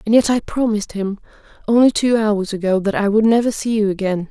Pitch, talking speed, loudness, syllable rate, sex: 215 Hz, 225 wpm, -17 LUFS, 5.9 syllables/s, female